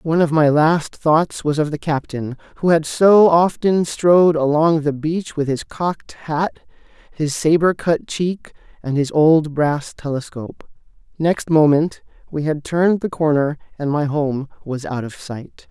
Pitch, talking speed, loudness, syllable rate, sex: 155 Hz, 170 wpm, -18 LUFS, 4.3 syllables/s, male